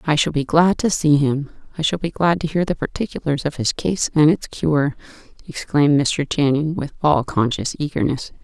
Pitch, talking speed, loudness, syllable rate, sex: 150 Hz, 200 wpm, -19 LUFS, 5.1 syllables/s, female